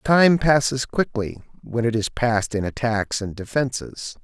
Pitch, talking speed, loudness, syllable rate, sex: 120 Hz, 155 wpm, -22 LUFS, 4.3 syllables/s, male